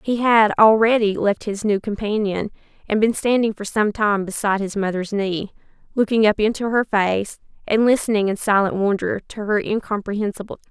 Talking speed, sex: 175 wpm, female